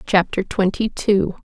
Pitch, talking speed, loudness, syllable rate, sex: 195 Hz, 125 wpm, -19 LUFS, 3.9 syllables/s, female